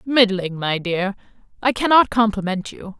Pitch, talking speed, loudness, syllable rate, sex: 210 Hz, 140 wpm, -19 LUFS, 4.5 syllables/s, female